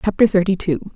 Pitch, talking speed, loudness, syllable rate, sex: 190 Hz, 190 wpm, -18 LUFS, 5.9 syllables/s, female